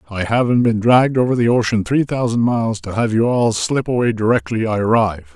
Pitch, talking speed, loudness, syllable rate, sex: 115 Hz, 215 wpm, -17 LUFS, 5.9 syllables/s, male